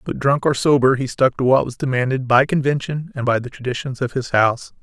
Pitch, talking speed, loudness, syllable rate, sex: 130 Hz, 235 wpm, -19 LUFS, 5.8 syllables/s, male